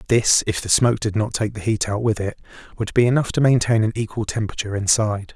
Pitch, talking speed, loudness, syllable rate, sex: 110 Hz, 235 wpm, -20 LUFS, 6.6 syllables/s, male